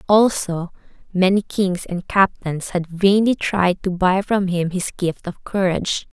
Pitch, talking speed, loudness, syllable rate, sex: 185 Hz, 155 wpm, -19 LUFS, 4.0 syllables/s, female